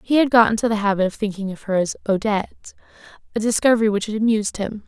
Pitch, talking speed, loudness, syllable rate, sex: 210 Hz, 220 wpm, -20 LUFS, 6.9 syllables/s, female